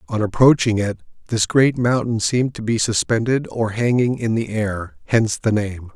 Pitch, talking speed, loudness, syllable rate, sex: 115 Hz, 170 wpm, -19 LUFS, 4.9 syllables/s, male